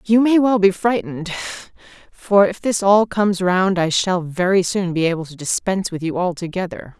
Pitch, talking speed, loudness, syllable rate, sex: 190 Hz, 180 wpm, -18 LUFS, 5.3 syllables/s, female